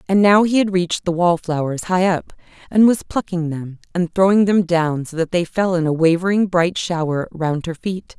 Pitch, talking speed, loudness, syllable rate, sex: 175 Hz, 215 wpm, -18 LUFS, 4.9 syllables/s, female